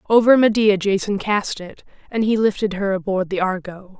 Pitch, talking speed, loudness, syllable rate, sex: 200 Hz, 180 wpm, -19 LUFS, 5.1 syllables/s, female